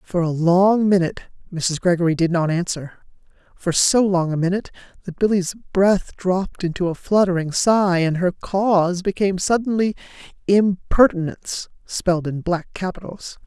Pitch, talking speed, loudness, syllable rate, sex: 185 Hz, 140 wpm, -20 LUFS, 4.9 syllables/s, female